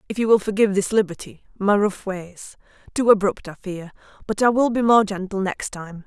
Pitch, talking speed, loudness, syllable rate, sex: 200 Hz, 180 wpm, -21 LUFS, 5.4 syllables/s, female